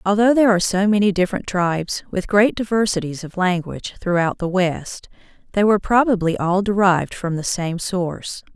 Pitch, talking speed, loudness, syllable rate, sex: 190 Hz, 170 wpm, -19 LUFS, 5.5 syllables/s, female